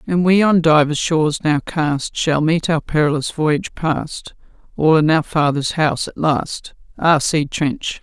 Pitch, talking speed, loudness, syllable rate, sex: 155 Hz, 170 wpm, -17 LUFS, 4.1 syllables/s, female